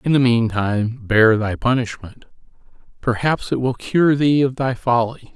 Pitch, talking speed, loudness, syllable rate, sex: 120 Hz, 155 wpm, -18 LUFS, 4.5 syllables/s, male